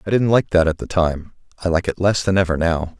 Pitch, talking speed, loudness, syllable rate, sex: 90 Hz, 280 wpm, -19 LUFS, 5.8 syllables/s, male